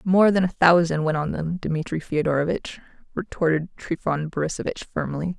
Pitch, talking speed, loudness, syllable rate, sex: 165 Hz, 145 wpm, -23 LUFS, 5.1 syllables/s, female